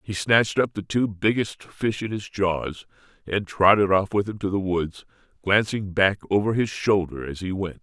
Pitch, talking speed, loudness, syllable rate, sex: 100 Hz, 200 wpm, -23 LUFS, 4.6 syllables/s, male